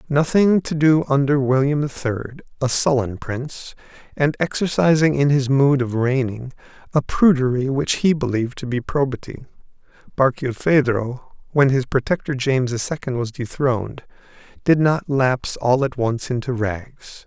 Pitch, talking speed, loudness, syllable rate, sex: 135 Hz, 145 wpm, -20 LUFS, 4.7 syllables/s, male